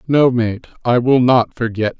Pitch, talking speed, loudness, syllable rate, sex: 120 Hz, 180 wpm, -16 LUFS, 4.2 syllables/s, male